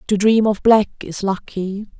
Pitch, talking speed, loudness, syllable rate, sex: 205 Hz, 180 wpm, -18 LUFS, 4.1 syllables/s, female